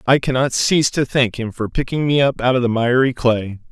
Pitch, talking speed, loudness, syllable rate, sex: 125 Hz, 240 wpm, -17 LUFS, 5.4 syllables/s, male